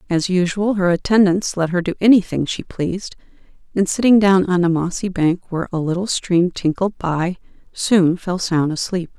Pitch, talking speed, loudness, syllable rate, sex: 180 Hz, 175 wpm, -18 LUFS, 5.0 syllables/s, female